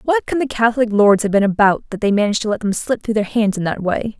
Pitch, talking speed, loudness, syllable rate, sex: 215 Hz, 300 wpm, -17 LUFS, 6.5 syllables/s, female